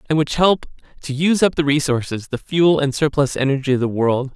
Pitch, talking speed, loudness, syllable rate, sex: 145 Hz, 220 wpm, -18 LUFS, 5.9 syllables/s, male